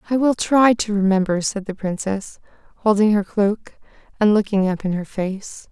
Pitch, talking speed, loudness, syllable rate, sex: 205 Hz, 180 wpm, -19 LUFS, 4.7 syllables/s, female